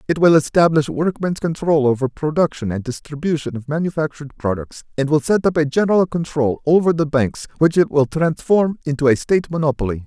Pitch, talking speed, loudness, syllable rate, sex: 150 Hz, 180 wpm, -18 LUFS, 5.8 syllables/s, male